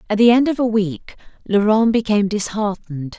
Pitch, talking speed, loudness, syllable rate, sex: 210 Hz, 170 wpm, -17 LUFS, 5.6 syllables/s, female